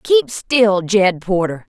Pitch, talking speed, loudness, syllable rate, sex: 200 Hz, 135 wpm, -16 LUFS, 3.0 syllables/s, female